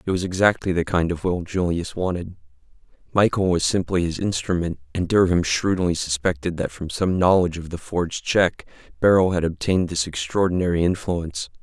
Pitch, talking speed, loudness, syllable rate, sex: 90 Hz, 165 wpm, -22 LUFS, 5.5 syllables/s, male